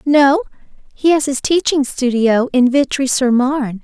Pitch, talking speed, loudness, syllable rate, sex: 265 Hz, 155 wpm, -15 LUFS, 4.4 syllables/s, female